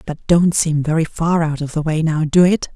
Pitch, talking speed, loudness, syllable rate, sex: 160 Hz, 260 wpm, -17 LUFS, 5.0 syllables/s, male